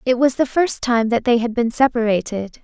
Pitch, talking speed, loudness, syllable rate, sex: 240 Hz, 230 wpm, -18 LUFS, 5.2 syllables/s, female